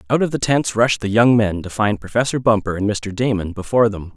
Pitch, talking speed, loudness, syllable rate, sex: 110 Hz, 245 wpm, -18 LUFS, 5.8 syllables/s, male